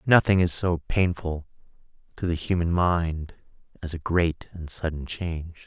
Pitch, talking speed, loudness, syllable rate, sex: 85 Hz, 150 wpm, -26 LUFS, 4.3 syllables/s, male